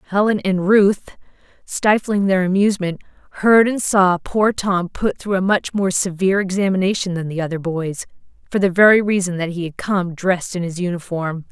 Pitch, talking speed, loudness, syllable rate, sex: 185 Hz, 175 wpm, -18 LUFS, 5.2 syllables/s, female